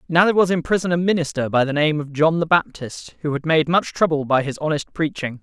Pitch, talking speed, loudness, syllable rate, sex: 155 Hz, 255 wpm, -19 LUFS, 6.0 syllables/s, male